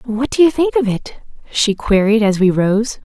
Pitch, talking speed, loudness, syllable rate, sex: 230 Hz, 210 wpm, -15 LUFS, 4.6 syllables/s, female